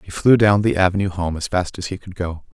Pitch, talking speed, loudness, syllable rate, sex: 95 Hz, 280 wpm, -19 LUFS, 5.9 syllables/s, male